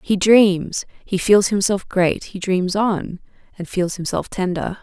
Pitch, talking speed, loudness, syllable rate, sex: 190 Hz, 160 wpm, -19 LUFS, 3.9 syllables/s, female